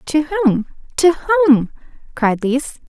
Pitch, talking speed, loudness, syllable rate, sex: 295 Hz, 125 wpm, -16 LUFS, 3.6 syllables/s, female